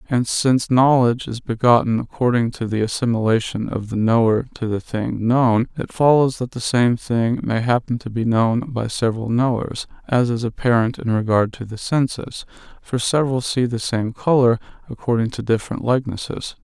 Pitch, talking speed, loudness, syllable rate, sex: 120 Hz, 175 wpm, -19 LUFS, 5.1 syllables/s, male